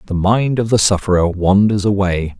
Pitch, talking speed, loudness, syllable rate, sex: 100 Hz, 175 wpm, -15 LUFS, 5.0 syllables/s, male